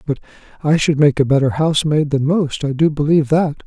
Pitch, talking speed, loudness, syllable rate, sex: 150 Hz, 195 wpm, -16 LUFS, 6.0 syllables/s, male